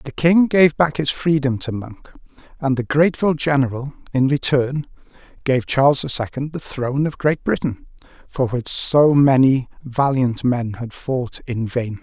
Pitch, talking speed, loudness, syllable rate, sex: 135 Hz, 165 wpm, -19 LUFS, 4.4 syllables/s, male